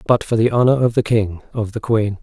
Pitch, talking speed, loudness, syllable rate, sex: 110 Hz, 245 wpm, -17 LUFS, 5.6 syllables/s, male